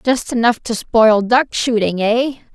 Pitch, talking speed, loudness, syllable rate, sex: 230 Hz, 165 wpm, -15 LUFS, 3.9 syllables/s, female